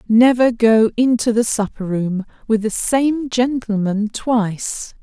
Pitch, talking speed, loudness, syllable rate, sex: 225 Hz, 130 wpm, -17 LUFS, 3.7 syllables/s, female